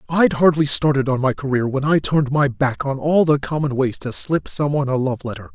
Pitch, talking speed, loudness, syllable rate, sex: 140 Hz, 240 wpm, -18 LUFS, 5.6 syllables/s, male